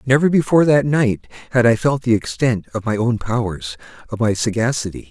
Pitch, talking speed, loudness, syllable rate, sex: 120 Hz, 175 wpm, -18 LUFS, 5.4 syllables/s, male